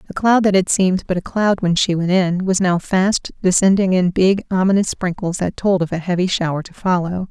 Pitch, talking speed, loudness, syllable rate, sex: 185 Hz, 230 wpm, -17 LUFS, 5.3 syllables/s, female